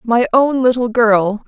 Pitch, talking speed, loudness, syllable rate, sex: 235 Hz, 165 wpm, -14 LUFS, 3.9 syllables/s, female